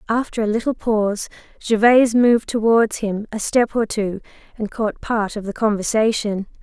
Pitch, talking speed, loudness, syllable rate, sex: 220 Hz, 165 wpm, -19 LUFS, 5.1 syllables/s, female